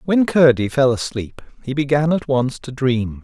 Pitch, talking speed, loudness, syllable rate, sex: 135 Hz, 185 wpm, -18 LUFS, 4.5 syllables/s, male